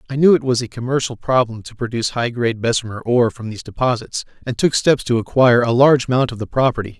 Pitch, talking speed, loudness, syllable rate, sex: 120 Hz, 230 wpm, -18 LUFS, 6.8 syllables/s, male